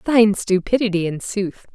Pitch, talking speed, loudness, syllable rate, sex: 205 Hz, 135 wpm, -19 LUFS, 4.2 syllables/s, female